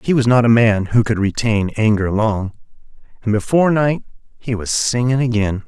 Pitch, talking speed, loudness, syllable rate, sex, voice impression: 115 Hz, 180 wpm, -17 LUFS, 5.0 syllables/s, male, very masculine, very adult-like, slightly old, very thick, slightly tensed, powerful, slightly dark, slightly hard, slightly clear, fluent, slightly raspy, cool, very intellectual, sincere, very calm, friendly, reassuring, slightly unique, slightly elegant, wild, slightly sweet, slightly lively, kind, modest